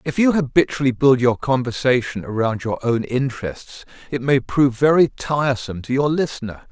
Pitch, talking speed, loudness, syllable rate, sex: 130 Hz, 160 wpm, -19 LUFS, 5.4 syllables/s, male